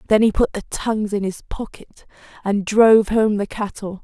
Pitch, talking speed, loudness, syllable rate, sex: 210 Hz, 195 wpm, -19 LUFS, 5.1 syllables/s, female